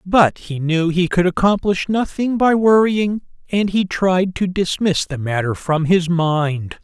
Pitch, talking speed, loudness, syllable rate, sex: 180 Hz, 165 wpm, -17 LUFS, 3.9 syllables/s, male